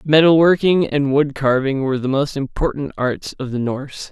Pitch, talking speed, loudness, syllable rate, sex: 140 Hz, 190 wpm, -18 LUFS, 5.1 syllables/s, male